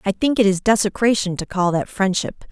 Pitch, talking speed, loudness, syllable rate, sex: 200 Hz, 215 wpm, -19 LUFS, 5.4 syllables/s, female